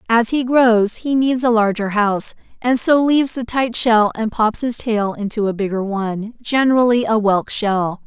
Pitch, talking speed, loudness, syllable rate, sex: 225 Hz, 195 wpm, -17 LUFS, 4.7 syllables/s, female